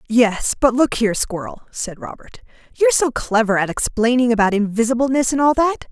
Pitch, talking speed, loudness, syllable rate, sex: 240 Hz, 170 wpm, -18 LUFS, 5.5 syllables/s, female